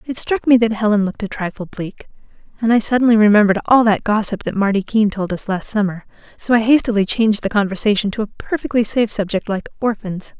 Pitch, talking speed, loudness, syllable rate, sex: 215 Hz, 210 wpm, -17 LUFS, 6.4 syllables/s, female